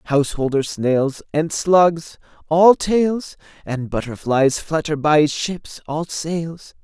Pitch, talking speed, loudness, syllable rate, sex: 155 Hz, 105 wpm, -19 LUFS, 3.3 syllables/s, male